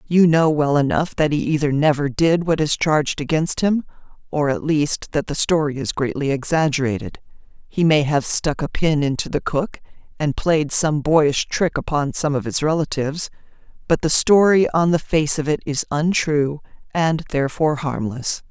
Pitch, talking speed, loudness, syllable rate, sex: 150 Hz, 170 wpm, -19 LUFS, 4.8 syllables/s, female